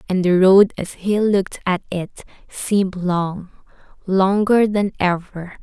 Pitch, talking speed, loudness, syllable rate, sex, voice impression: 190 Hz, 130 wpm, -18 LUFS, 3.9 syllables/s, female, feminine, slightly adult-like, slightly soft, slightly cute, slightly calm, friendly